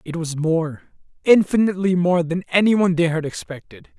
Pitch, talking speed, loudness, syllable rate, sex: 170 Hz, 150 wpm, -19 LUFS, 5.6 syllables/s, male